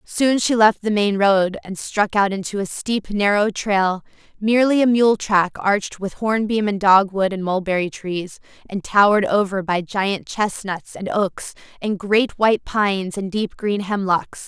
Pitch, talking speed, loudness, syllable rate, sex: 200 Hz, 175 wpm, -19 LUFS, 4.3 syllables/s, female